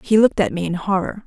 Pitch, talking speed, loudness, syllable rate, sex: 195 Hz, 285 wpm, -19 LUFS, 6.9 syllables/s, female